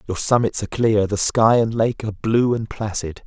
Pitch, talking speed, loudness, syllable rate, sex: 110 Hz, 220 wpm, -19 LUFS, 5.1 syllables/s, male